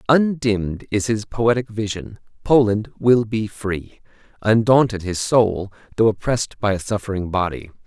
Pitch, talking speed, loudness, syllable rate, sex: 110 Hz, 120 wpm, -20 LUFS, 4.6 syllables/s, male